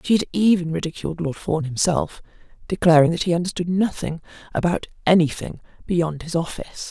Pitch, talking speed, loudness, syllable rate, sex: 170 Hz, 150 wpm, -21 LUFS, 5.8 syllables/s, female